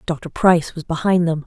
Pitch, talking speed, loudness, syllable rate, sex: 165 Hz, 205 wpm, -18 LUFS, 5.2 syllables/s, female